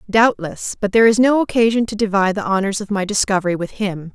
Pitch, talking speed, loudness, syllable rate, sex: 205 Hz, 215 wpm, -17 LUFS, 6.3 syllables/s, female